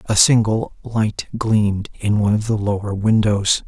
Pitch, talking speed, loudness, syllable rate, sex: 105 Hz, 165 wpm, -18 LUFS, 4.5 syllables/s, male